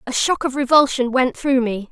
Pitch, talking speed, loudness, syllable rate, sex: 260 Hz, 220 wpm, -18 LUFS, 5.1 syllables/s, female